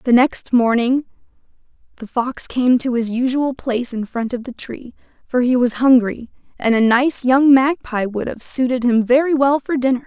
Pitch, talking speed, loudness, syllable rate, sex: 250 Hz, 190 wpm, -17 LUFS, 4.7 syllables/s, female